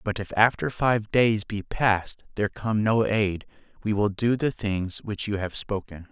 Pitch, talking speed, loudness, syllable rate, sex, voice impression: 105 Hz, 195 wpm, -25 LUFS, 4.2 syllables/s, male, masculine, adult-like, tensed, slightly bright, clear, fluent, cool, calm, wild, lively